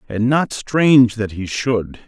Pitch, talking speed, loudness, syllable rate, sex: 120 Hz, 175 wpm, -17 LUFS, 3.8 syllables/s, male